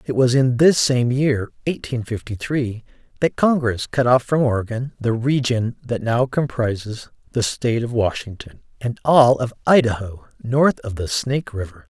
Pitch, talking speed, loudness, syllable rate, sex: 120 Hz, 165 wpm, -20 LUFS, 4.6 syllables/s, male